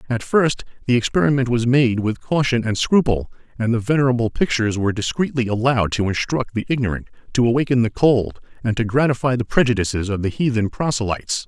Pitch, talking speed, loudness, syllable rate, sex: 120 Hz, 180 wpm, -19 LUFS, 6.2 syllables/s, male